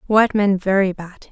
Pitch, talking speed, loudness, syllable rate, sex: 195 Hz, 185 wpm, -17 LUFS, 5.2 syllables/s, female